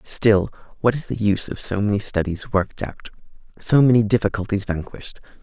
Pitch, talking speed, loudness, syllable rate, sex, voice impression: 105 Hz, 165 wpm, -21 LUFS, 6.0 syllables/s, male, very feminine, slightly gender-neutral, very middle-aged, slightly thin, slightly tensed, slightly weak, bright, very soft, muffled, slightly fluent, raspy, slightly cute, very intellectual, slightly refreshing, very sincere, very calm, very friendly, very reassuring, unique, very elegant, wild, very sweet, lively, very kind, very modest